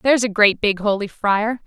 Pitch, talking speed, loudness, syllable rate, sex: 215 Hz, 215 wpm, -18 LUFS, 4.9 syllables/s, female